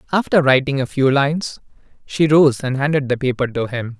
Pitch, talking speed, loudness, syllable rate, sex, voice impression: 135 Hz, 195 wpm, -17 LUFS, 5.5 syllables/s, male, masculine, adult-like, tensed, slightly powerful, bright, clear, fluent, intellectual, friendly, reassuring, unique, lively, slightly light